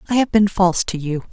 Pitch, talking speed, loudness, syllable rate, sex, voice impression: 190 Hz, 275 wpm, -18 LUFS, 6.6 syllables/s, female, very feminine, very adult-like, slightly thin, tensed, slightly powerful, bright, soft, clear, fluent, slightly raspy, cool, intellectual, very refreshing, sincere, calm, friendly, very reassuring, unique, elegant, slightly wild, sweet, lively, kind, slightly intense